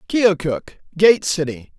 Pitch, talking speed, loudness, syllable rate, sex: 175 Hz, 100 wpm, -18 LUFS, 3.7 syllables/s, male